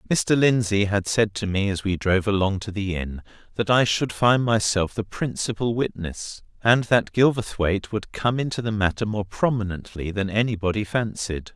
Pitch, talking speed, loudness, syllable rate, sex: 105 Hz, 175 wpm, -23 LUFS, 4.9 syllables/s, male